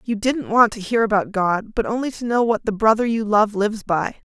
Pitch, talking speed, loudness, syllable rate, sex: 220 Hz, 250 wpm, -20 LUFS, 5.4 syllables/s, female